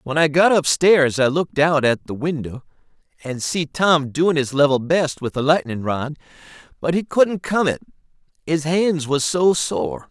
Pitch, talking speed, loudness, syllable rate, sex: 150 Hz, 190 wpm, -19 LUFS, 4.5 syllables/s, male